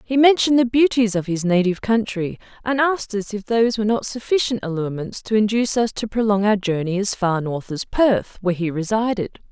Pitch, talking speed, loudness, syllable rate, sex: 210 Hz, 200 wpm, -20 LUFS, 5.9 syllables/s, female